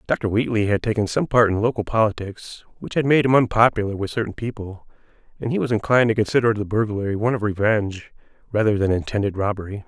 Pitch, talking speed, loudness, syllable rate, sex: 110 Hz, 195 wpm, -21 LUFS, 6.4 syllables/s, male